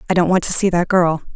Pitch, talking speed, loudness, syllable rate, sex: 175 Hz, 310 wpm, -16 LUFS, 6.7 syllables/s, female